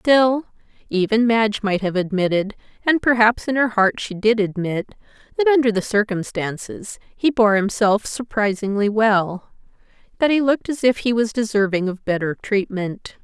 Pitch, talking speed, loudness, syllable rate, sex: 215 Hz, 155 wpm, -19 LUFS, 4.8 syllables/s, female